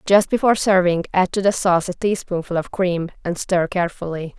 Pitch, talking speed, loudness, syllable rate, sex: 180 Hz, 190 wpm, -20 LUFS, 5.7 syllables/s, female